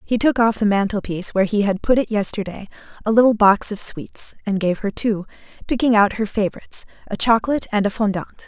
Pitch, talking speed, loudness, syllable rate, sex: 210 Hz, 205 wpm, -19 LUFS, 6.2 syllables/s, female